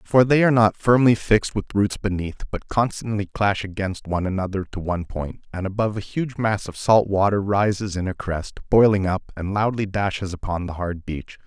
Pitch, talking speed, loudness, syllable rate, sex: 100 Hz, 205 wpm, -22 LUFS, 5.5 syllables/s, male